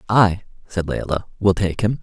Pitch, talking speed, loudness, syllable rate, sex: 95 Hz, 180 wpm, -20 LUFS, 4.6 syllables/s, male